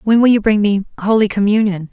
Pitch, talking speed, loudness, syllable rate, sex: 210 Hz, 220 wpm, -14 LUFS, 6.0 syllables/s, female